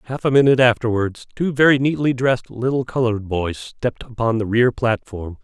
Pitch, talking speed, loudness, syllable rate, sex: 120 Hz, 175 wpm, -19 LUFS, 5.7 syllables/s, male